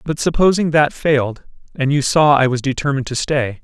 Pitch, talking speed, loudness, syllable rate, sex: 140 Hz, 200 wpm, -16 LUFS, 5.6 syllables/s, male